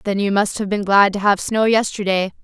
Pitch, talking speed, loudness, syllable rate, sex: 200 Hz, 245 wpm, -17 LUFS, 5.4 syllables/s, female